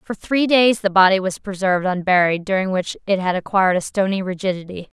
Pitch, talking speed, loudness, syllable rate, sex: 190 Hz, 195 wpm, -18 LUFS, 5.9 syllables/s, female